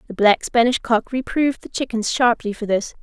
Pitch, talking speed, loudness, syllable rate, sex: 235 Hz, 200 wpm, -19 LUFS, 5.4 syllables/s, female